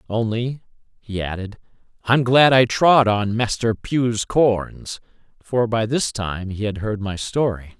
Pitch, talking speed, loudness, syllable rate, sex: 115 Hz, 155 wpm, -20 LUFS, 3.8 syllables/s, male